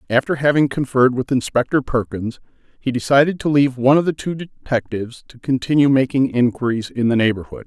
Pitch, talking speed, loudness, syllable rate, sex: 130 Hz, 170 wpm, -18 LUFS, 6.1 syllables/s, male